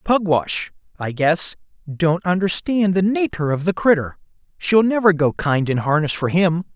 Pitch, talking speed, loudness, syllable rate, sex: 175 Hz, 160 wpm, -19 LUFS, 4.5 syllables/s, male